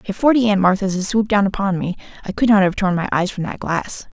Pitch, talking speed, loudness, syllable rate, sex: 195 Hz, 270 wpm, -18 LUFS, 6.2 syllables/s, female